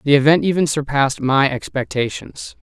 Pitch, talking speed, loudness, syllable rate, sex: 140 Hz, 135 wpm, -17 LUFS, 5.2 syllables/s, male